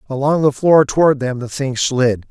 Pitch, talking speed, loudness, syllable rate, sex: 135 Hz, 210 wpm, -15 LUFS, 4.8 syllables/s, male